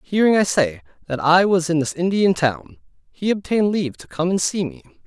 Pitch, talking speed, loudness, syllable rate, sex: 175 Hz, 215 wpm, -19 LUFS, 5.5 syllables/s, male